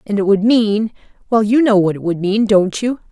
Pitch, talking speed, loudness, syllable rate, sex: 210 Hz, 230 wpm, -15 LUFS, 5.1 syllables/s, female